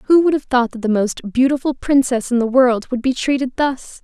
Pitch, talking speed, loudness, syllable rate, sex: 255 Hz, 240 wpm, -17 LUFS, 5.1 syllables/s, female